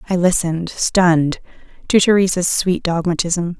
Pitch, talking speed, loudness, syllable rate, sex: 175 Hz, 115 wpm, -16 LUFS, 4.8 syllables/s, female